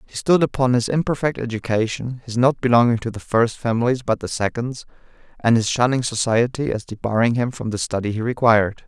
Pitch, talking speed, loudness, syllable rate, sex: 120 Hz, 190 wpm, -20 LUFS, 5.8 syllables/s, male